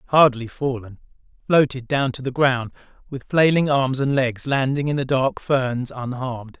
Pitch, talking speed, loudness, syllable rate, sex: 130 Hz, 155 wpm, -21 LUFS, 4.6 syllables/s, male